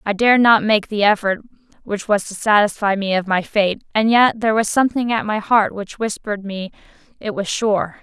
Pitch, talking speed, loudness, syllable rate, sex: 210 Hz, 200 wpm, -18 LUFS, 5.4 syllables/s, female